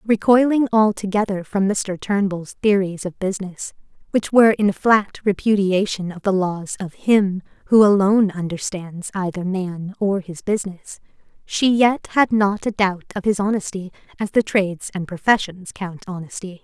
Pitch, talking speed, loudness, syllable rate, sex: 195 Hz, 150 wpm, -20 LUFS, 4.7 syllables/s, female